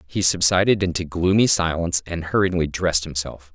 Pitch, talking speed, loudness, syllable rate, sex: 85 Hz, 150 wpm, -20 LUFS, 5.6 syllables/s, male